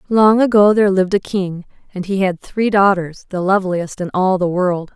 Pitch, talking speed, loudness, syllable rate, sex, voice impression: 190 Hz, 205 wpm, -16 LUFS, 5.2 syllables/s, female, feminine, adult-like, tensed, powerful, bright, soft, clear, intellectual, calm, lively, slightly sharp